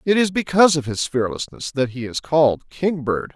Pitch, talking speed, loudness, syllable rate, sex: 150 Hz, 195 wpm, -20 LUFS, 5.3 syllables/s, male